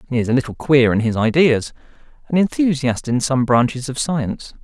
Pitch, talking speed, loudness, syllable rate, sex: 130 Hz, 180 wpm, -18 LUFS, 5.5 syllables/s, male